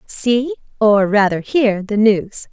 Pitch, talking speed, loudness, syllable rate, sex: 210 Hz, 145 wpm, -15 LUFS, 3.3 syllables/s, female